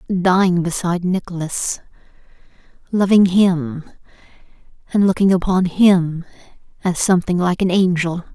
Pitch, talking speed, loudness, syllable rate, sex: 180 Hz, 100 wpm, -17 LUFS, 4.6 syllables/s, female